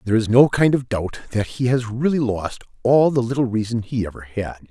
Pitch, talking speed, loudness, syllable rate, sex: 115 Hz, 230 wpm, -20 LUFS, 5.4 syllables/s, male